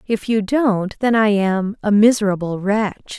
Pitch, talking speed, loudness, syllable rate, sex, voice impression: 210 Hz, 150 wpm, -17 LUFS, 4.1 syllables/s, female, feminine, adult-like, tensed, powerful, clear, fluent, intellectual, calm, slightly unique, lively, slightly strict, slightly sharp